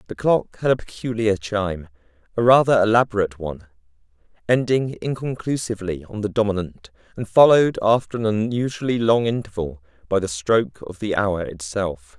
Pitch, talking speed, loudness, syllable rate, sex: 105 Hz, 145 wpm, -21 LUFS, 5.5 syllables/s, male